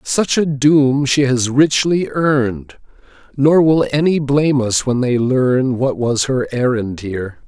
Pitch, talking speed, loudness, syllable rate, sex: 130 Hz, 160 wpm, -15 LUFS, 3.9 syllables/s, male